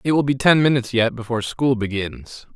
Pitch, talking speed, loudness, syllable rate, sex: 125 Hz, 210 wpm, -19 LUFS, 5.8 syllables/s, male